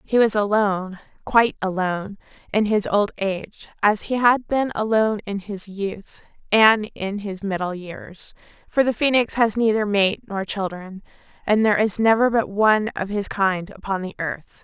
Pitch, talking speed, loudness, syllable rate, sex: 205 Hz, 170 wpm, -21 LUFS, 4.7 syllables/s, female